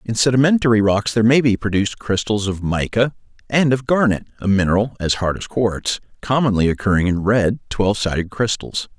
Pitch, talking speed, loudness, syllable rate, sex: 110 Hz, 175 wpm, -18 LUFS, 3.1 syllables/s, male